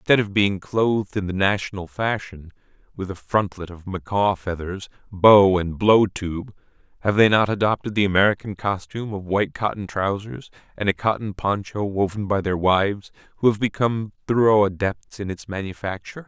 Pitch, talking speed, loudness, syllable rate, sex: 100 Hz, 165 wpm, -21 LUFS, 5.6 syllables/s, male